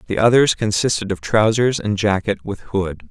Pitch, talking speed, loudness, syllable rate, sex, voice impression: 105 Hz, 175 wpm, -18 LUFS, 5.0 syllables/s, male, masculine, adult-like, tensed, powerful, hard, clear, cool, intellectual, sincere, calm, friendly, wild, lively